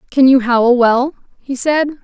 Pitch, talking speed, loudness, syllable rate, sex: 260 Hz, 175 wpm, -13 LUFS, 3.9 syllables/s, female